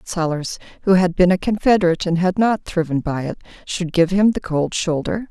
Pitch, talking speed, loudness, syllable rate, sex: 175 Hz, 205 wpm, -19 LUFS, 5.3 syllables/s, female